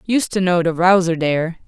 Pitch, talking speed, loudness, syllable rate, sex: 175 Hz, 215 wpm, -17 LUFS, 5.3 syllables/s, female